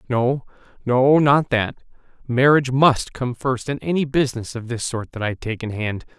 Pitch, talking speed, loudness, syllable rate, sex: 125 Hz, 185 wpm, -20 LUFS, 4.8 syllables/s, male